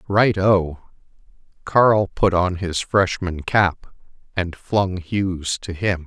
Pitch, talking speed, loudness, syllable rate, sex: 95 Hz, 130 wpm, -20 LUFS, 3.0 syllables/s, male